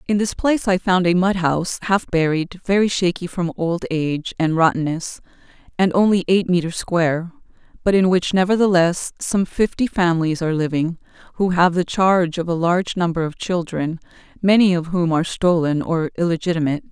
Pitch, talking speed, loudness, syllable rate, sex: 175 Hz, 170 wpm, -19 LUFS, 5.5 syllables/s, female